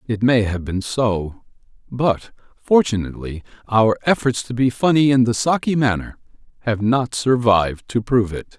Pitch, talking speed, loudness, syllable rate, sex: 115 Hz, 155 wpm, -19 LUFS, 4.8 syllables/s, male